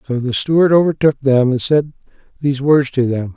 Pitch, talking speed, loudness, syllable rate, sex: 135 Hz, 195 wpm, -15 LUFS, 5.5 syllables/s, male